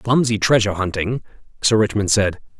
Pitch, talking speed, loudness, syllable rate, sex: 105 Hz, 140 wpm, -18 LUFS, 5.6 syllables/s, male